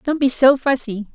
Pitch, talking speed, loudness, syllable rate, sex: 260 Hz, 210 wpm, -16 LUFS, 5.1 syllables/s, female